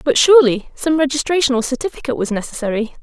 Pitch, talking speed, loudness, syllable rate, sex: 270 Hz, 160 wpm, -16 LUFS, 7.0 syllables/s, female